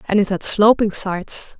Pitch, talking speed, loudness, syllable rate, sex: 200 Hz, 190 wpm, -17 LUFS, 4.9 syllables/s, female